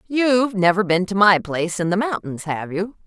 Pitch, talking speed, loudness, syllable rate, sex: 195 Hz, 215 wpm, -19 LUFS, 5.3 syllables/s, female